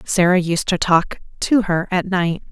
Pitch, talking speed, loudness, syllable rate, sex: 180 Hz, 190 wpm, -18 LUFS, 4.3 syllables/s, female